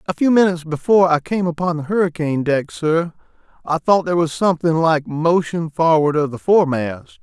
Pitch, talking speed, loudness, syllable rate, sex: 160 Hz, 185 wpm, -17 LUFS, 5.8 syllables/s, male